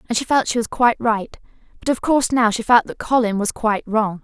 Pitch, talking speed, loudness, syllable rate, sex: 230 Hz, 255 wpm, -19 LUFS, 6.0 syllables/s, female